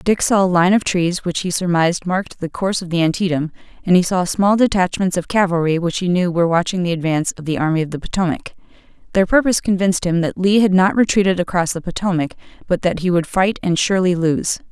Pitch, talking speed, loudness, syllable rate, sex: 180 Hz, 225 wpm, -17 LUFS, 6.3 syllables/s, female